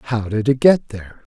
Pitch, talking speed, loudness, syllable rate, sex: 115 Hz, 220 wpm, -17 LUFS, 5.7 syllables/s, male